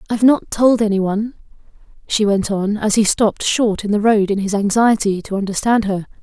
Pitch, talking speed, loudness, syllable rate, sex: 210 Hz, 200 wpm, -16 LUFS, 5.6 syllables/s, female